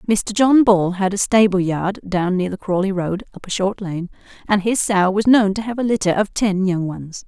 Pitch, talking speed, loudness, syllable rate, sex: 195 Hz, 240 wpm, -18 LUFS, 4.9 syllables/s, female